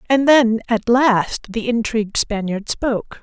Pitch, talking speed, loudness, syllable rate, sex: 230 Hz, 150 wpm, -18 LUFS, 4.1 syllables/s, female